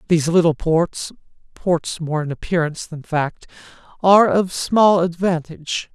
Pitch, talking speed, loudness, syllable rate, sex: 170 Hz, 130 wpm, -18 LUFS, 5.7 syllables/s, male